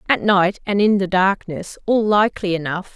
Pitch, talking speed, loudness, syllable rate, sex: 195 Hz, 185 wpm, -18 LUFS, 5.0 syllables/s, female